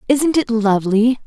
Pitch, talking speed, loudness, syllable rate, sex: 235 Hz, 145 wpm, -16 LUFS, 4.8 syllables/s, female